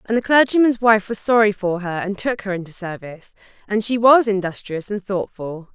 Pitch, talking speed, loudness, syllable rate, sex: 205 Hz, 200 wpm, -19 LUFS, 5.3 syllables/s, female